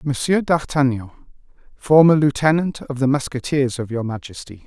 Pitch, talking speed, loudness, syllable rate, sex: 135 Hz, 130 wpm, -19 LUFS, 5.3 syllables/s, male